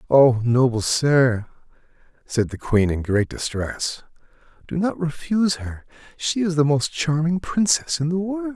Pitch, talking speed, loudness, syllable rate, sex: 135 Hz, 155 wpm, -21 LUFS, 4.2 syllables/s, male